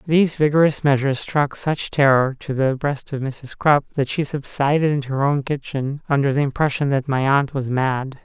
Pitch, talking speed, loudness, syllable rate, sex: 140 Hz, 195 wpm, -20 LUFS, 5.1 syllables/s, male